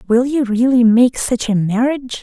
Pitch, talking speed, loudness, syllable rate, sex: 240 Hz, 190 wpm, -15 LUFS, 4.9 syllables/s, female